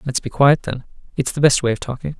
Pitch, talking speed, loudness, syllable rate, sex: 135 Hz, 275 wpm, -18 LUFS, 6.3 syllables/s, female